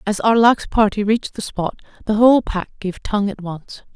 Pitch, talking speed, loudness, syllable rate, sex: 210 Hz, 195 wpm, -18 LUFS, 5.3 syllables/s, female